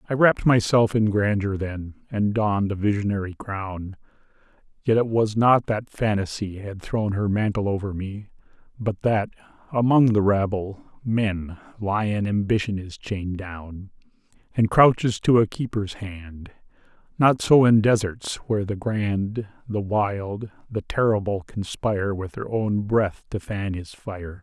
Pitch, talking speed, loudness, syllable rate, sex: 105 Hz, 140 wpm, -23 LUFS, 4.1 syllables/s, male